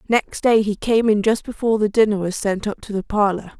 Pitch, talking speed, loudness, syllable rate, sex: 210 Hz, 250 wpm, -19 LUFS, 5.6 syllables/s, female